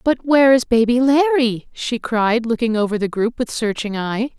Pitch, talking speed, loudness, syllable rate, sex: 235 Hz, 190 wpm, -18 LUFS, 4.8 syllables/s, female